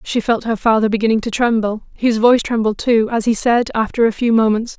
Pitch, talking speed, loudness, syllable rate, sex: 225 Hz, 225 wpm, -16 LUFS, 5.7 syllables/s, female